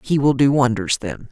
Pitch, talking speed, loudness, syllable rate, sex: 135 Hz, 230 wpm, -18 LUFS, 5.1 syllables/s, female